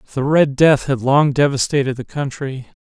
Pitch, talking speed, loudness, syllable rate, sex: 140 Hz, 170 wpm, -17 LUFS, 5.0 syllables/s, male